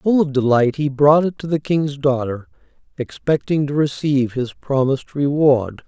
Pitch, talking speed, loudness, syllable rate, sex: 140 Hz, 165 wpm, -18 LUFS, 4.8 syllables/s, male